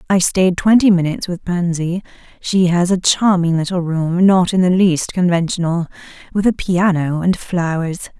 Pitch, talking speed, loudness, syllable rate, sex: 180 Hz, 160 wpm, -16 LUFS, 4.5 syllables/s, female